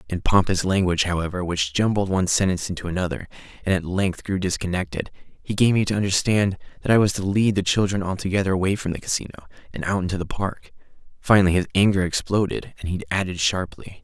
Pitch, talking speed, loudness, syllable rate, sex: 95 Hz, 190 wpm, -22 LUFS, 6.4 syllables/s, male